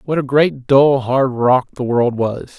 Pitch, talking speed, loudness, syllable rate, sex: 130 Hz, 210 wpm, -15 LUFS, 3.8 syllables/s, male